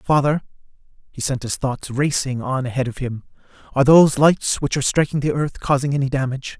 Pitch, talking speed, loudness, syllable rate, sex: 135 Hz, 190 wpm, -19 LUFS, 5.9 syllables/s, male